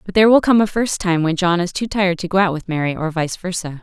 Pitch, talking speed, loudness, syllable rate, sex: 180 Hz, 315 wpm, -17 LUFS, 6.5 syllables/s, female